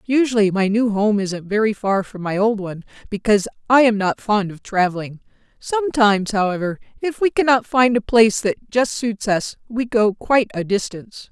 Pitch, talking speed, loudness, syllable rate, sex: 215 Hz, 185 wpm, -19 LUFS, 5.4 syllables/s, female